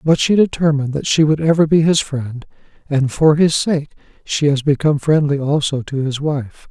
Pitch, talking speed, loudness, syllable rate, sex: 145 Hz, 195 wpm, -16 LUFS, 5.1 syllables/s, male